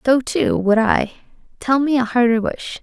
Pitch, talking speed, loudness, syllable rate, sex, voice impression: 245 Hz, 190 wpm, -17 LUFS, 4.4 syllables/s, female, feminine, adult-like, tensed, slightly weak, slightly dark, clear, intellectual, calm, lively, slightly sharp, slightly modest